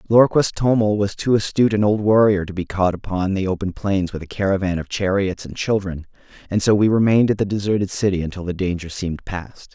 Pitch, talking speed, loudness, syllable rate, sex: 100 Hz, 215 wpm, -20 LUFS, 6.0 syllables/s, male